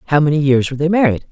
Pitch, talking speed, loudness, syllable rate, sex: 150 Hz, 275 wpm, -15 LUFS, 8.3 syllables/s, female